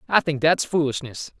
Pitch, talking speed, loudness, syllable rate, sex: 145 Hz, 170 wpm, -22 LUFS, 5.2 syllables/s, male